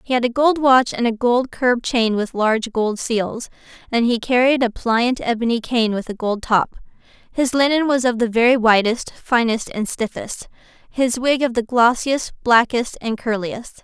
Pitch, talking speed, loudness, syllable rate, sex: 240 Hz, 185 wpm, -18 LUFS, 4.6 syllables/s, female